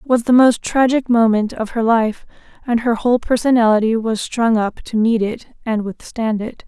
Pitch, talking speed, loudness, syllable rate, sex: 230 Hz, 200 wpm, -17 LUFS, 5.0 syllables/s, female